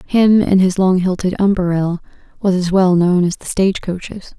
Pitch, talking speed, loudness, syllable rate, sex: 185 Hz, 190 wpm, -15 LUFS, 5.0 syllables/s, female